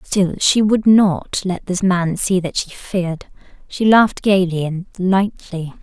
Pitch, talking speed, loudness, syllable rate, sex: 190 Hz, 165 wpm, -17 LUFS, 3.9 syllables/s, female